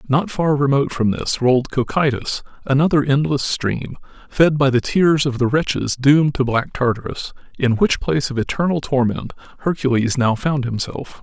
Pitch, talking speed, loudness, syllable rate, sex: 135 Hz, 165 wpm, -18 LUFS, 5.0 syllables/s, male